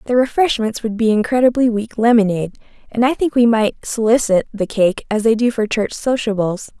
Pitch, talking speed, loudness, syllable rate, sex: 225 Hz, 185 wpm, -16 LUFS, 5.5 syllables/s, female